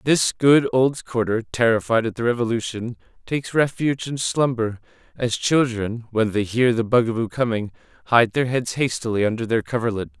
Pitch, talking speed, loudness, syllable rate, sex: 120 Hz, 160 wpm, -21 LUFS, 5.2 syllables/s, male